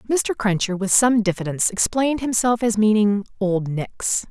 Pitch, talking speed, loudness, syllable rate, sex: 215 Hz, 155 wpm, -20 LUFS, 4.8 syllables/s, female